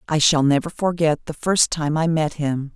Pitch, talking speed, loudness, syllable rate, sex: 155 Hz, 220 wpm, -20 LUFS, 4.8 syllables/s, female